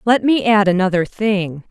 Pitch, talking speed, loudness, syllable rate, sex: 200 Hz, 175 wpm, -16 LUFS, 4.5 syllables/s, female